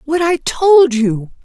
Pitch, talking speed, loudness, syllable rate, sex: 290 Hz, 165 wpm, -13 LUFS, 3.3 syllables/s, female